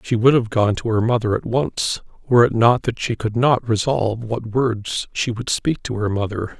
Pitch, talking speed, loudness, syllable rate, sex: 115 Hz, 225 wpm, -20 LUFS, 4.8 syllables/s, male